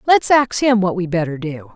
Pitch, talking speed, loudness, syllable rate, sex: 200 Hz, 240 wpm, -16 LUFS, 5.0 syllables/s, female